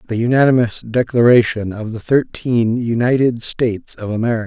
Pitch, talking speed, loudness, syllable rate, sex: 120 Hz, 135 wpm, -16 LUFS, 5.3 syllables/s, male